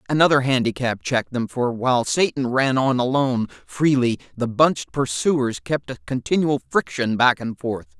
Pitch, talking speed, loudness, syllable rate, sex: 125 Hz, 160 wpm, -21 LUFS, 5.0 syllables/s, male